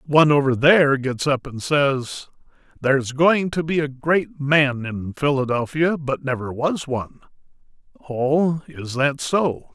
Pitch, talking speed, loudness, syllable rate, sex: 145 Hz, 155 wpm, -20 LUFS, 4.3 syllables/s, male